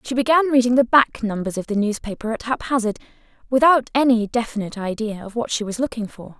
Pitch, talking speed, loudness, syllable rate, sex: 235 Hz, 195 wpm, -20 LUFS, 6.3 syllables/s, female